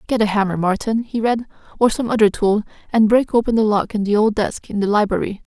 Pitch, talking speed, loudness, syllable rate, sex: 215 Hz, 240 wpm, -18 LUFS, 5.9 syllables/s, female